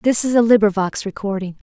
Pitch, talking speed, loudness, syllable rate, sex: 210 Hz, 180 wpm, -17 LUFS, 5.9 syllables/s, female